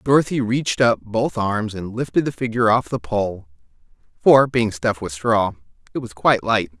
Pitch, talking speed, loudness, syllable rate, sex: 110 Hz, 185 wpm, -20 LUFS, 5.2 syllables/s, male